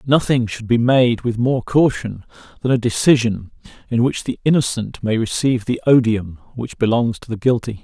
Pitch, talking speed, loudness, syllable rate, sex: 120 Hz, 175 wpm, -18 LUFS, 5.1 syllables/s, male